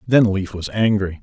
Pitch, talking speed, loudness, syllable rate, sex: 100 Hz, 195 wpm, -19 LUFS, 4.6 syllables/s, male